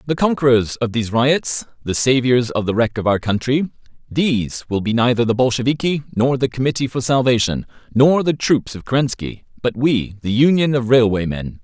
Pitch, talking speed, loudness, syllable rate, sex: 125 Hz, 175 wpm, -18 LUFS, 5.3 syllables/s, male